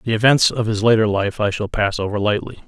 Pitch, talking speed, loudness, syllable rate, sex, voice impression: 105 Hz, 245 wpm, -18 LUFS, 5.9 syllables/s, male, masculine, middle-aged, thick, powerful, muffled, raspy, cool, intellectual, mature, wild, slightly strict, slightly sharp